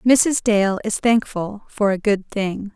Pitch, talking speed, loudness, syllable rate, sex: 210 Hz, 175 wpm, -20 LUFS, 3.5 syllables/s, female